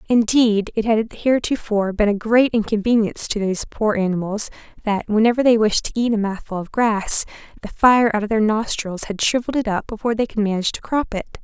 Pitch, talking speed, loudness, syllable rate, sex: 220 Hz, 205 wpm, -19 LUFS, 5.9 syllables/s, female